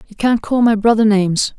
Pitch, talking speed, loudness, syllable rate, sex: 215 Hz, 225 wpm, -14 LUFS, 5.6 syllables/s, female